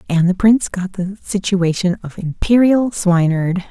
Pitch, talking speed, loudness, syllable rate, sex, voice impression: 190 Hz, 145 wpm, -16 LUFS, 4.7 syllables/s, female, feminine, adult-like, slightly soft, calm, friendly, slightly sweet, slightly kind